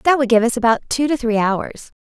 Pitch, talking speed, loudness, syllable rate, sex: 240 Hz, 265 wpm, -17 LUFS, 5.8 syllables/s, female